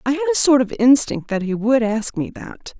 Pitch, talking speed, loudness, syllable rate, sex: 250 Hz, 260 wpm, -18 LUFS, 5.3 syllables/s, female